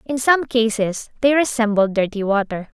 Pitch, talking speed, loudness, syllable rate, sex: 230 Hz, 150 wpm, -19 LUFS, 4.8 syllables/s, female